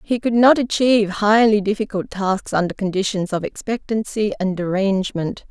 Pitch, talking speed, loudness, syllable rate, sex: 205 Hz, 140 wpm, -19 LUFS, 5.1 syllables/s, female